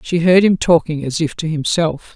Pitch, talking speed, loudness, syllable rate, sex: 160 Hz, 220 wpm, -16 LUFS, 4.9 syllables/s, female